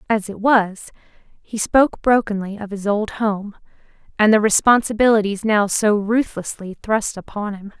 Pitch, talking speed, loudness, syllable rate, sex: 210 Hz, 145 wpm, -18 LUFS, 4.6 syllables/s, female